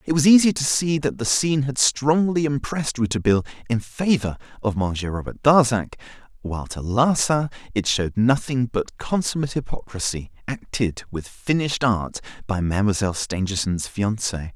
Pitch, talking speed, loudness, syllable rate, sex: 120 Hz, 145 wpm, -22 LUFS, 5.4 syllables/s, male